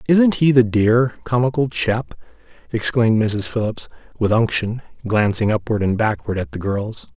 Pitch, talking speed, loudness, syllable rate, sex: 110 Hz, 150 wpm, -19 LUFS, 4.6 syllables/s, male